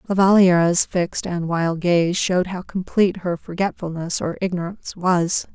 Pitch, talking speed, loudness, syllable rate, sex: 180 Hz, 150 wpm, -20 LUFS, 4.9 syllables/s, female